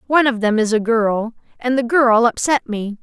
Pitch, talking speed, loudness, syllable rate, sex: 235 Hz, 220 wpm, -17 LUFS, 5.0 syllables/s, female